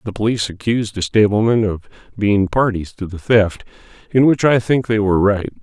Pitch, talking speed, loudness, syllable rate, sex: 105 Hz, 190 wpm, -17 LUFS, 5.6 syllables/s, male